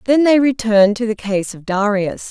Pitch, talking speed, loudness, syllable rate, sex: 220 Hz, 210 wpm, -16 LUFS, 5.1 syllables/s, female